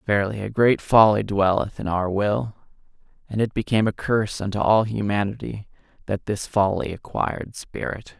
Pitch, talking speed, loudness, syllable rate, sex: 105 Hz, 155 wpm, -22 LUFS, 5.2 syllables/s, male